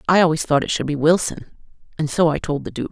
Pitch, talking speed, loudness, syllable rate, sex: 155 Hz, 270 wpm, -19 LUFS, 6.6 syllables/s, female